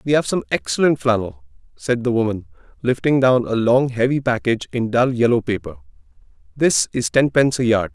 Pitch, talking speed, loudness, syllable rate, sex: 125 Hz, 180 wpm, -18 LUFS, 5.6 syllables/s, male